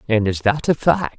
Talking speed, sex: 255 wpm, male